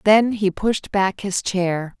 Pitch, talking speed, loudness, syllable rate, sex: 195 Hz, 180 wpm, -20 LUFS, 3.2 syllables/s, female